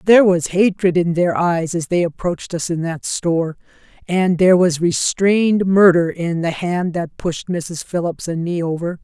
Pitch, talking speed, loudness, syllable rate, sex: 175 Hz, 185 wpm, -17 LUFS, 4.6 syllables/s, female